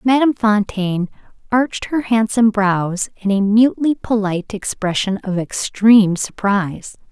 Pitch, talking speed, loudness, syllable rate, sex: 210 Hz, 120 wpm, -17 LUFS, 4.9 syllables/s, female